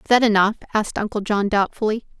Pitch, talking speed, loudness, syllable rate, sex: 210 Hz, 190 wpm, -20 LUFS, 6.6 syllables/s, female